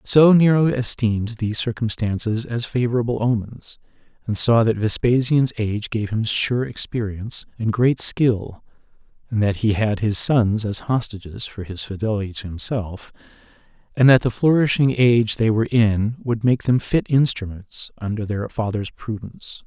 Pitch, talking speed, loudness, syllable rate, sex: 115 Hz, 155 wpm, -20 LUFS, 4.8 syllables/s, male